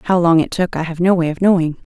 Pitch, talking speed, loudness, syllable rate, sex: 170 Hz, 315 wpm, -16 LUFS, 6.2 syllables/s, female